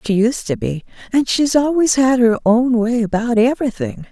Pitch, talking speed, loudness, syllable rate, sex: 235 Hz, 190 wpm, -16 LUFS, 4.9 syllables/s, female